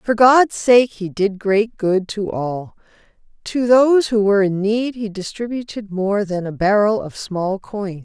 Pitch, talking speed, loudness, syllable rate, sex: 210 Hz, 180 wpm, -18 LUFS, 4.1 syllables/s, female